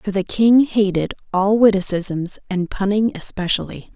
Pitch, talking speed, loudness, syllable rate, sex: 195 Hz, 135 wpm, -18 LUFS, 4.4 syllables/s, female